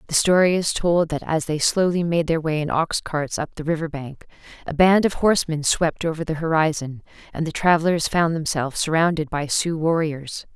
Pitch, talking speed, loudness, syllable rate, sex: 160 Hz, 200 wpm, -21 LUFS, 5.3 syllables/s, female